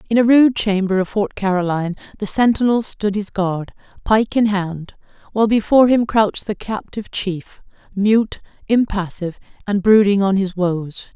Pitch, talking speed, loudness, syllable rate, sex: 205 Hz, 155 wpm, -18 LUFS, 4.9 syllables/s, female